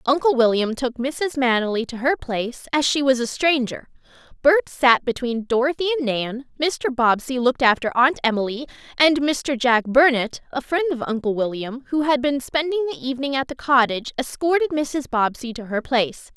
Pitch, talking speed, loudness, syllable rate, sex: 260 Hz, 180 wpm, -21 LUFS, 5.2 syllables/s, female